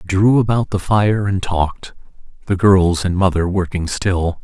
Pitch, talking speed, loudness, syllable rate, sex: 95 Hz, 175 wpm, -17 LUFS, 4.6 syllables/s, male